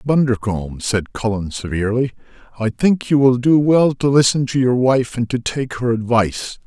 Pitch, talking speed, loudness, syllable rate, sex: 120 Hz, 180 wpm, -17 LUFS, 5.0 syllables/s, male